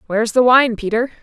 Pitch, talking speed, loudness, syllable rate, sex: 230 Hz, 245 wpm, -15 LUFS, 7.3 syllables/s, female